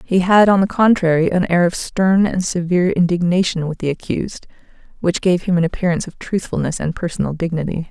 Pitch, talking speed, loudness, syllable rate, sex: 180 Hz, 190 wpm, -17 LUFS, 5.9 syllables/s, female